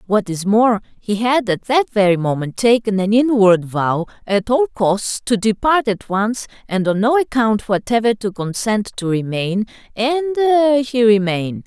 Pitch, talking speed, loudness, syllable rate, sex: 220 Hz, 165 wpm, -17 LUFS, 4.5 syllables/s, female